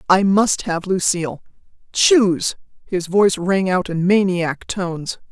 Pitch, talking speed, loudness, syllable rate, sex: 185 Hz, 135 wpm, -18 LUFS, 4.2 syllables/s, female